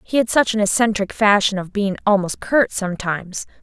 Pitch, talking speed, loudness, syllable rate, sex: 205 Hz, 180 wpm, -18 LUFS, 5.5 syllables/s, female